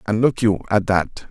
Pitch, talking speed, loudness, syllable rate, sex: 105 Hz, 230 wpm, -19 LUFS, 4.4 syllables/s, male